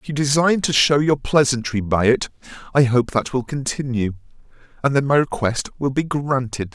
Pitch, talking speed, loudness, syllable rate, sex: 130 Hz, 185 wpm, -19 LUFS, 5.2 syllables/s, male